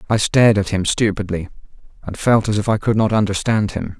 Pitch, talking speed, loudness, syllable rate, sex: 105 Hz, 210 wpm, -17 LUFS, 5.8 syllables/s, male